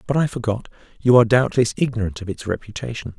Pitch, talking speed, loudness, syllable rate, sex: 115 Hz, 190 wpm, -20 LUFS, 6.7 syllables/s, male